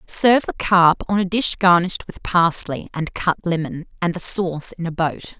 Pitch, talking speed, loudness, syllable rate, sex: 175 Hz, 200 wpm, -19 LUFS, 4.9 syllables/s, female